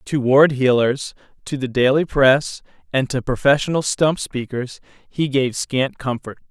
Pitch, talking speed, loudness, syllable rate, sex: 135 Hz, 145 wpm, -19 LUFS, 4.2 syllables/s, male